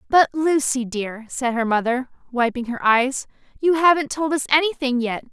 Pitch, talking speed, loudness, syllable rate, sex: 265 Hz, 170 wpm, -20 LUFS, 4.8 syllables/s, female